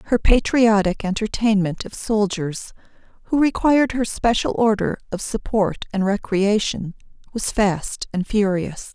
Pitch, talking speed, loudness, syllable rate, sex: 210 Hz, 120 wpm, -20 LUFS, 4.3 syllables/s, female